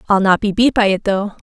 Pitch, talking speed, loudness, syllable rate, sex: 200 Hz, 285 wpm, -15 LUFS, 6.0 syllables/s, female